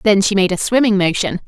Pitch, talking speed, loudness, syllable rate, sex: 200 Hz, 245 wpm, -15 LUFS, 5.7 syllables/s, female